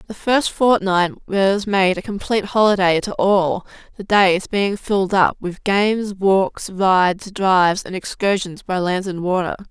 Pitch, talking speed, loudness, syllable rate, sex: 190 Hz, 160 wpm, -18 LUFS, 4.2 syllables/s, female